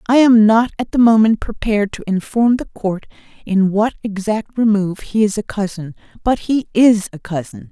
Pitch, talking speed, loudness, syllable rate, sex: 210 Hz, 185 wpm, -16 LUFS, 5.0 syllables/s, female